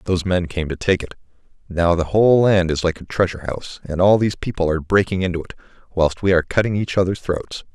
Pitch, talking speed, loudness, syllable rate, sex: 90 Hz, 230 wpm, -19 LUFS, 6.7 syllables/s, male